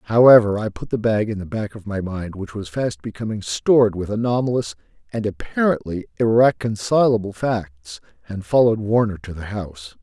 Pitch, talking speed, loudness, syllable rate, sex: 105 Hz, 170 wpm, -20 LUFS, 5.2 syllables/s, male